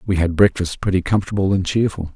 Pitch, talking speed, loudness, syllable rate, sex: 95 Hz, 195 wpm, -19 LUFS, 6.5 syllables/s, male